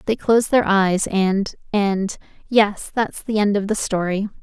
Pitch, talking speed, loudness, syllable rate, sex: 205 Hz, 165 wpm, -19 LUFS, 4.1 syllables/s, female